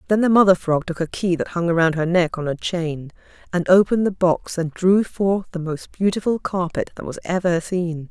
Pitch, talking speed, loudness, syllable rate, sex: 175 Hz, 220 wpm, -20 LUFS, 5.1 syllables/s, female